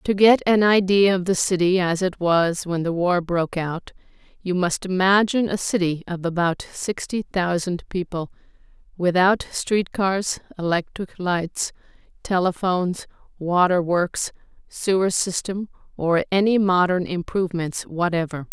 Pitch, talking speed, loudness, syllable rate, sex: 180 Hz, 125 wpm, -21 LUFS, 4.4 syllables/s, female